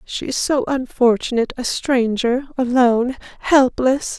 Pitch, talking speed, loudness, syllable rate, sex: 255 Hz, 115 wpm, -18 LUFS, 4.4 syllables/s, female